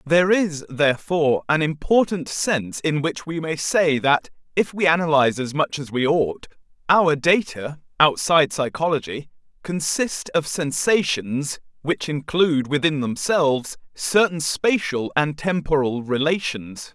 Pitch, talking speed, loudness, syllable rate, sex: 155 Hz, 125 wpm, -21 LUFS, 4.4 syllables/s, male